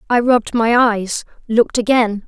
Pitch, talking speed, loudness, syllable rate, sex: 230 Hz, 160 wpm, -16 LUFS, 4.8 syllables/s, female